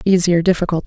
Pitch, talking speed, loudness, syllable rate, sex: 175 Hz, 205 wpm, -16 LUFS, 8.0 syllables/s, female